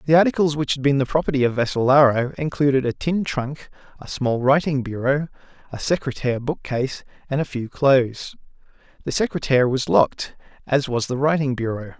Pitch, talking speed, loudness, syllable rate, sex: 135 Hz, 165 wpm, -21 LUFS, 5.8 syllables/s, male